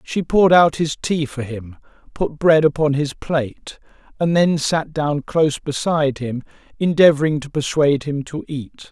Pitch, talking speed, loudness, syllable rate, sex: 150 Hz, 170 wpm, -18 LUFS, 4.7 syllables/s, male